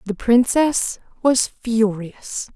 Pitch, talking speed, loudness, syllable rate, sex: 230 Hz, 95 wpm, -19 LUFS, 2.8 syllables/s, female